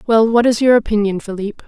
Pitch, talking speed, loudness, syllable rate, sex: 220 Hz, 215 wpm, -15 LUFS, 5.9 syllables/s, female